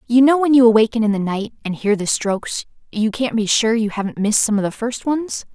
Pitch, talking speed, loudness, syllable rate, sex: 225 Hz, 260 wpm, -18 LUFS, 5.8 syllables/s, female